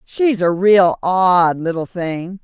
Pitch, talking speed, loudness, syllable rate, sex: 180 Hz, 150 wpm, -15 LUFS, 3.1 syllables/s, female